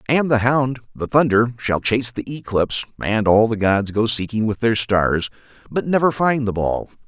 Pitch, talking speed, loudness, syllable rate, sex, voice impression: 115 Hz, 195 wpm, -19 LUFS, 4.9 syllables/s, male, masculine, very adult-like, cool, sincere, calm, slightly mature, slightly wild